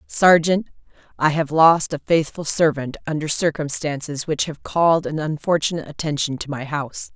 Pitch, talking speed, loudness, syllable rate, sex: 155 Hz, 150 wpm, -20 LUFS, 5.1 syllables/s, female